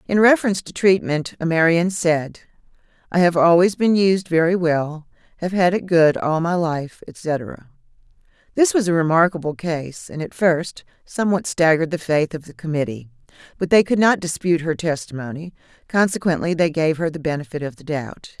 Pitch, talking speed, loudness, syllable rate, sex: 165 Hz, 170 wpm, -19 LUFS, 5.2 syllables/s, female